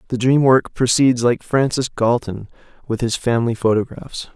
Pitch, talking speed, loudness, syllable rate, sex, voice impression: 120 Hz, 150 wpm, -18 LUFS, 5.0 syllables/s, male, masculine, adult-like, slightly thin, weak, slightly dark, raspy, sincere, calm, reassuring, kind, modest